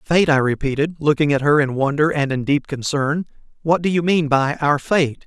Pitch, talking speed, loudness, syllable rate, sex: 150 Hz, 215 wpm, -18 LUFS, 5.1 syllables/s, male